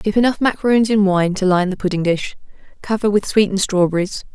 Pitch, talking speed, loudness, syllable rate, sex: 200 Hz, 195 wpm, -17 LUFS, 6.1 syllables/s, female